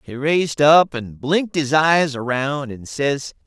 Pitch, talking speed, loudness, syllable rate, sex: 145 Hz, 175 wpm, -18 LUFS, 4.0 syllables/s, male